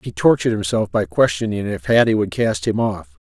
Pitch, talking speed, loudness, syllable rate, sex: 110 Hz, 200 wpm, -18 LUFS, 5.5 syllables/s, male